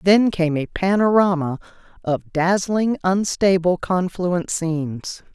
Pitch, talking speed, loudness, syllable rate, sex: 180 Hz, 100 wpm, -20 LUFS, 3.7 syllables/s, female